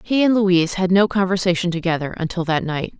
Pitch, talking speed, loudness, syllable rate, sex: 185 Hz, 200 wpm, -19 LUFS, 6.0 syllables/s, female